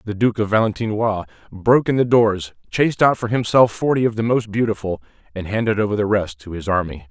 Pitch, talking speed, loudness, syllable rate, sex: 105 Hz, 210 wpm, -19 LUFS, 6.0 syllables/s, male